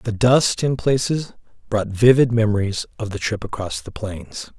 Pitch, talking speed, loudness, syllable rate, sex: 110 Hz, 170 wpm, -20 LUFS, 4.5 syllables/s, male